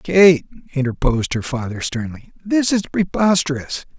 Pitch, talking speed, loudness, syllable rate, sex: 150 Hz, 120 wpm, -19 LUFS, 4.7 syllables/s, male